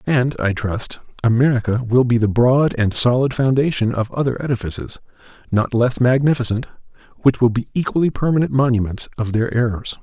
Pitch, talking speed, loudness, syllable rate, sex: 120 Hz, 155 wpm, -18 LUFS, 5.5 syllables/s, male